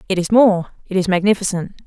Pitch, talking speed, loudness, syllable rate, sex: 195 Hz, 160 wpm, -17 LUFS, 6.2 syllables/s, female